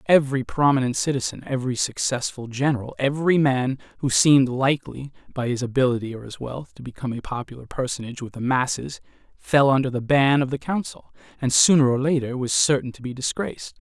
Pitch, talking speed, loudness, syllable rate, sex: 135 Hz, 175 wpm, -22 LUFS, 6.1 syllables/s, male